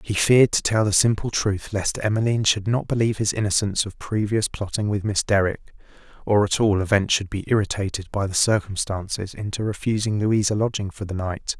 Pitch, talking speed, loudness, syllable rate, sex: 105 Hz, 195 wpm, -22 LUFS, 5.9 syllables/s, male